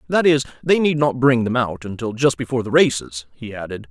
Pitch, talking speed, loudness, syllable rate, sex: 125 Hz, 230 wpm, -19 LUFS, 5.7 syllables/s, male